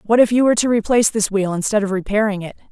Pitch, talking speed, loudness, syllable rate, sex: 210 Hz, 265 wpm, -17 LUFS, 7.3 syllables/s, female